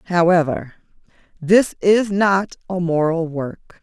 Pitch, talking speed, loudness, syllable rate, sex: 175 Hz, 110 wpm, -18 LUFS, 3.9 syllables/s, female